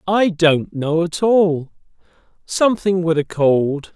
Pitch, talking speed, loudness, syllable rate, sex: 170 Hz, 120 wpm, -17 LUFS, 3.6 syllables/s, male